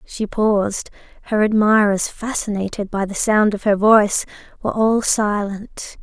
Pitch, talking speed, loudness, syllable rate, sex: 210 Hz, 140 wpm, -18 LUFS, 4.5 syllables/s, female